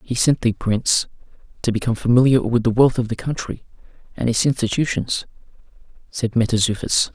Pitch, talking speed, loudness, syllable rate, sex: 120 Hz, 150 wpm, -19 LUFS, 5.8 syllables/s, male